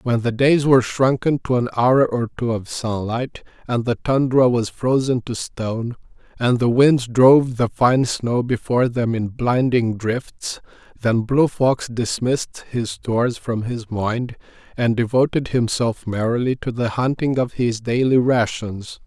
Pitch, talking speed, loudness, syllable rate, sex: 120 Hz, 160 wpm, -19 LUFS, 4.2 syllables/s, male